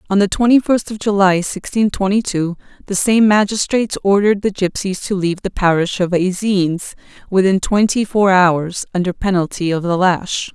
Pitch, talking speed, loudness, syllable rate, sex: 195 Hz, 170 wpm, -16 LUFS, 5.1 syllables/s, female